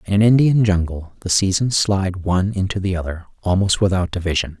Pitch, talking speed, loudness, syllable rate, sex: 95 Hz, 185 wpm, -18 LUFS, 6.0 syllables/s, male